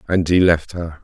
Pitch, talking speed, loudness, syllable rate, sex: 85 Hz, 230 wpm, -16 LUFS, 4.7 syllables/s, male